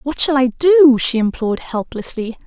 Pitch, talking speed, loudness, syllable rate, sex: 260 Hz, 170 wpm, -15 LUFS, 4.9 syllables/s, female